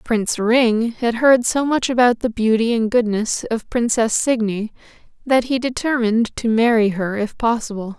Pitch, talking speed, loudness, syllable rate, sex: 230 Hz, 165 wpm, -18 LUFS, 4.6 syllables/s, female